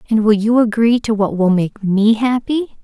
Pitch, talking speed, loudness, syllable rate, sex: 220 Hz, 210 wpm, -15 LUFS, 4.6 syllables/s, female